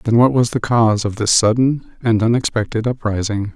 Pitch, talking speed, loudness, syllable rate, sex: 115 Hz, 185 wpm, -17 LUFS, 5.4 syllables/s, male